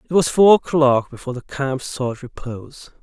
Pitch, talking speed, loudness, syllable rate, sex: 140 Hz, 180 wpm, -18 LUFS, 4.9 syllables/s, male